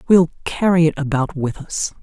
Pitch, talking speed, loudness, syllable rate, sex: 160 Hz, 180 wpm, -18 LUFS, 4.9 syllables/s, female